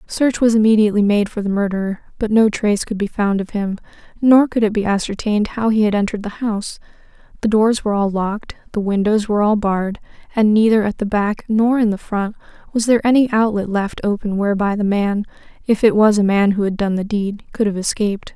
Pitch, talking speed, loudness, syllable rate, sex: 210 Hz, 210 wpm, -17 LUFS, 6.0 syllables/s, female